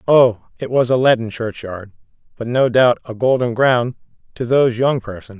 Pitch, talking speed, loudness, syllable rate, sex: 120 Hz, 180 wpm, -16 LUFS, 4.9 syllables/s, male